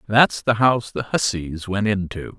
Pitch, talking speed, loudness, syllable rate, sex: 105 Hz, 175 wpm, -20 LUFS, 4.5 syllables/s, male